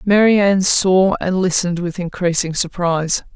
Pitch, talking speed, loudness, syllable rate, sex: 180 Hz, 125 wpm, -16 LUFS, 4.8 syllables/s, female